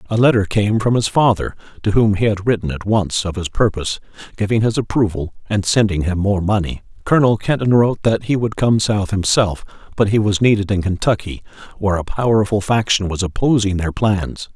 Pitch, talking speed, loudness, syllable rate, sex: 105 Hz, 195 wpm, -17 LUFS, 5.6 syllables/s, male